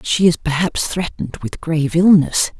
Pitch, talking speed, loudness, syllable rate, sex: 165 Hz, 160 wpm, -17 LUFS, 4.9 syllables/s, female